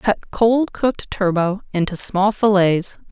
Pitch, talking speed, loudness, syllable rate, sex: 200 Hz, 135 wpm, -18 LUFS, 3.8 syllables/s, female